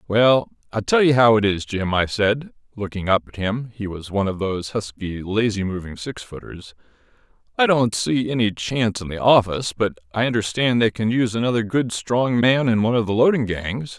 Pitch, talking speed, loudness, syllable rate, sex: 110 Hz, 195 wpm, -20 LUFS, 5.4 syllables/s, male